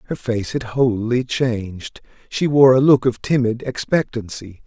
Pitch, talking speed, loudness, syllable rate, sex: 120 Hz, 155 wpm, -18 LUFS, 4.3 syllables/s, male